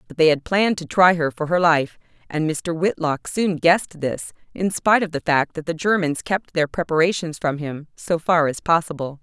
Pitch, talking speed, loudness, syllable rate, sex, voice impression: 165 Hz, 215 wpm, -20 LUFS, 5.1 syllables/s, female, feminine, slightly gender-neutral, very adult-like, slightly middle-aged, thin, tensed, powerful, bright, hard, clear, fluent, cool, intellectual, slightly refreshing, sincere, calm, slightly mature, friendly, reassuring, very unique, lively, slightly strict, slightly intense